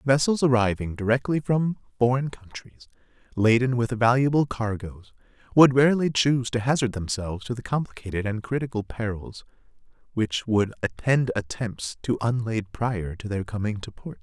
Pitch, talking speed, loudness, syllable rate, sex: 115 Hz, 145 wpm, -24 LUFS, 5.2 syllables/s, male